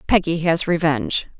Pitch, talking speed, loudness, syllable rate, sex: 165 Hz, 130 wpm, -19 LUFS, 5.2 syllables/s, female